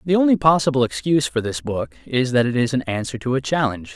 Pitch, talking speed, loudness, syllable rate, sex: 135 Hz, 245 wpm, -20 LUFS, 6.4 syllables/s, male